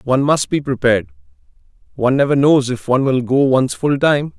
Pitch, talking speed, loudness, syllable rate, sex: 135 Hz, 190 wpm, -16 LUFS, 6.1 syllables/s, male